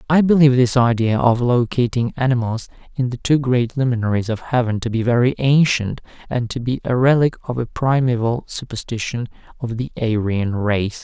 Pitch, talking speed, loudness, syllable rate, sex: 120 Hz, 170 wpm, -19 LUFS, 5.2 syllables/s, male